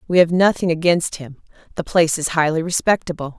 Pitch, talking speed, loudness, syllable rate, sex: 165 Hz, 175 wpm, -18 LUFS, 5.9 syllables/s, female